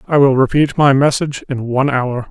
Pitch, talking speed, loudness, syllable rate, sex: 135 Hz, 210 wpm, -14 LUFS, 5.6 syllables/s, male